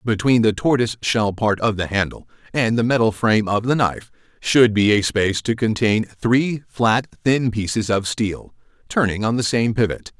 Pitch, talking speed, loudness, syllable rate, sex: 110 Hz, 190 wpm, -19 LUFS, 5.0 syllables/s, male